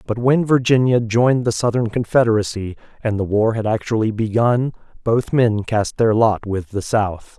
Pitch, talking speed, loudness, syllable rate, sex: 115 Hz, 170 wpm, -18 LUFS, 4.8 syllables/s, male